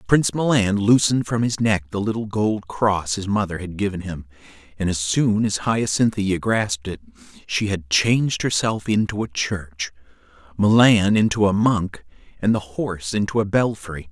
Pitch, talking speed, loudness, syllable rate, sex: 100 Hz, 165 wpm, -21 LUFS, 4.8 syllables/s, male